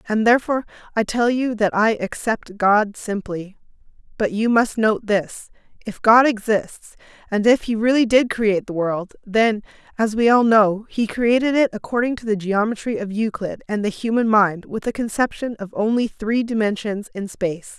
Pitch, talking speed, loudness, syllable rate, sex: 220 Hz, 180 wpm, -20 LUFS, 4.8 syllables/s, female